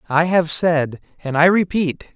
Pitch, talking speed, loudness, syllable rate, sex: 165 Hz, 165 wpm, -18 LUFS, 4.1 syllables/s, male